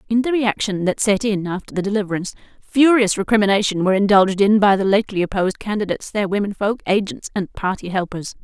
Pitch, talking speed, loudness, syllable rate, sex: 200 Hz, 185 wpm, -18 LUFS, 6.6 syllables/s, female